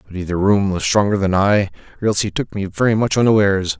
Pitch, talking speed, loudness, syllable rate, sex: 100 Hz, 235 wpm, -17 LUFS, 6.7 syllables/s, male